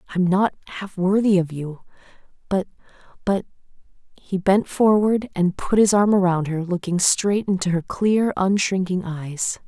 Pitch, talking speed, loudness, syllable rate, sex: 190 Hz, 130 wpm, -21 LUFS, 4.6 syllables/s, female